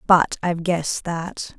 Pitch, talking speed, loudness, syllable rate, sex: 170 Hz, 150 wpm, -22 LUFS, 4.4 syllables/s, female